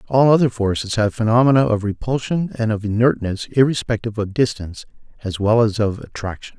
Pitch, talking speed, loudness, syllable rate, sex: 115 Hz, 165 wpm, -19 LUFS, 5.9 syllables/s, male